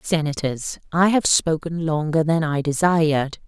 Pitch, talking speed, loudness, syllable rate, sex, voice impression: 160 Hz, 140 wpm, -20 LUFS, 4.4 syllables/s, female, feminine, middle-aged, tensed, slightly powerful, slightly hard, clear, raspy, intellectual, calm, reassuring, elegant, slightly kind, slightly sharp